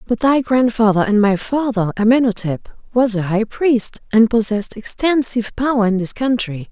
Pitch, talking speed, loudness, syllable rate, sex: 225 Hz, 160 wpm, -17 LUFS, 5.0 syllables/s, female